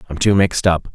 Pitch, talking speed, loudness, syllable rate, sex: 90 Hz, 255 wpm, -16 LUFS, 6.8 syllables/s, male